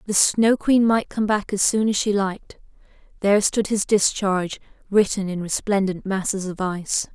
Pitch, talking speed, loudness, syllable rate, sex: 200 Hz, 175 wpm, -21 LUFS, 5.0 syllables/s, female